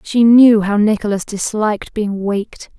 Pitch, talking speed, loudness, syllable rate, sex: 210 Hz, 150 wpm, -14 LUFS, 4.6 syllables/s, female